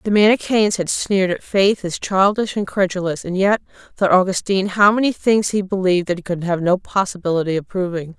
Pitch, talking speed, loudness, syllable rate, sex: 190 Hz, 200 wpm, -18 LUFS, 5.7 syllables/s, female